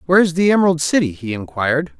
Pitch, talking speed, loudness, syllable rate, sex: 150 Hz, 210 wpm, -17 LUFS, 7.1 syllables/s, male